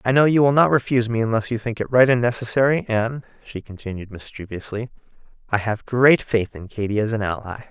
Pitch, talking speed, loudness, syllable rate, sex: 115 Hz, 210 wpm, -20 LUFS, 5.9 syllables/s, male